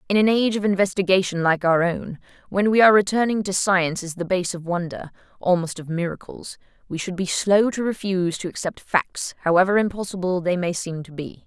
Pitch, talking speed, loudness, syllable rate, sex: 185 Hz, 190 wpm, -21 LUFS, 5.8 syllables/s, female